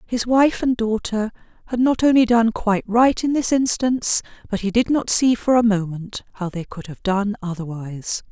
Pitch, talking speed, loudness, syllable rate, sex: 220 Hz, 195 wpm, -20 LUFS, 5.0 syllables/s, female